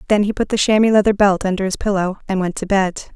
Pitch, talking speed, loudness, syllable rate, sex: 200 Hz, 265 wpm, -17 LUFS, 6.4 syllables/s, female